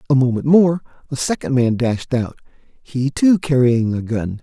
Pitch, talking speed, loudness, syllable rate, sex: 130 Hz, 175 wpm, -17 LUFS, 4.3 syllables/s, male